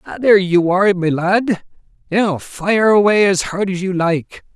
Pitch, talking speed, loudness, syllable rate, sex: 190 Hz, 170 wpm, -15 LUFS, 4.5 syllables/s, male